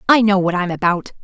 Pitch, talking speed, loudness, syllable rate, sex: 190 Hz, 295 wpm, -16 LUFS, 7.1 syllables/s, female